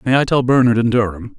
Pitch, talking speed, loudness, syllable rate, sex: 120 Hz, 260 wpm, -15 LUFS, 6.2 syllables/s, male